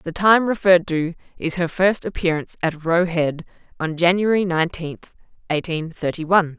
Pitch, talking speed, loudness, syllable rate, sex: 170 Hz, 155 wpm, -20 LUFS, 5.2 syllables/s, female